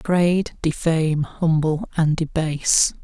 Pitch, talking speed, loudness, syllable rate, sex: 160 Hz, 100 wpm, -20 LUFS, 4.3 syllables/s, male